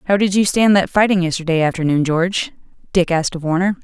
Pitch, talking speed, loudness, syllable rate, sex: 180 Hz, 205 wpm, -16 LUFS, 6.5 syllables/s, female